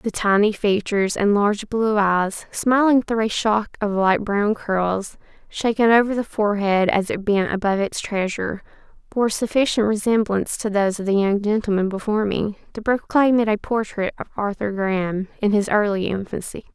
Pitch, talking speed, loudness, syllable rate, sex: 210 Hz, 170 wpm, -20 LUFS, 5.1 syllables/s, female